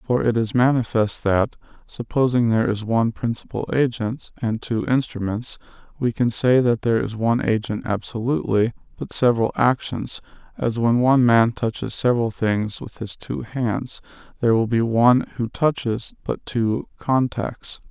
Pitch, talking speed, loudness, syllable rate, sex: 115 Hz, 155 wpm, -21 LUFS, 4.8 syllables/s, male